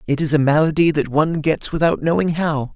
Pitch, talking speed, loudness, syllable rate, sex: 155 Hz, 220 wpm, -18 LUFS, 5.8 syllables/s, male